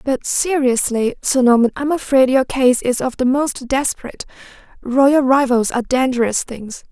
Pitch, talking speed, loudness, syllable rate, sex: 260 Hz, 165 wpm, -16 LUFS, 4.9 syllables/s, female